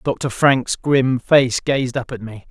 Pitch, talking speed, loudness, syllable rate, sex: 130 Hz, 190 wpm, -17 LUFS, 3.3 syllables/s, male